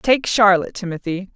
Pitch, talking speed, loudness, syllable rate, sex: 195 Hz, 135 wpm, -18 LUFS, 5.4 syllables/s, female